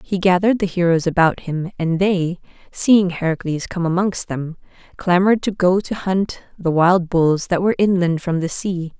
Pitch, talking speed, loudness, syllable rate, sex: 180 Hz, 180 wpm, -18 LUFS, 4.8 syllables/s, female